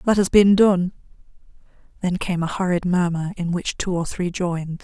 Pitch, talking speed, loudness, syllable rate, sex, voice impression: 180 Hz, 185 wpm, -21 LUFS, 5.1 syllables/s, female, feminine, adult-like, fluent, slightly sweet